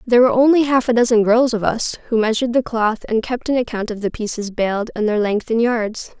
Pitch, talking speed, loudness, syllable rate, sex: 230 Hz, 250 wpm, -18 LUFS, 5.8 syllables/s, female